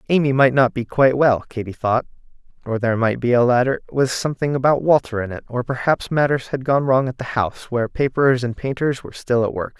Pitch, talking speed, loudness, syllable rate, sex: 125 Hz, 225 wpm, -19 LUFS, 6.1 syllables/s, male